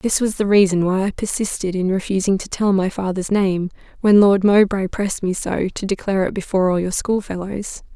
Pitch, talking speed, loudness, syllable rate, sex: 195 Hz, 210 wpm, -19 LUFS, 5.5 syllables/s, female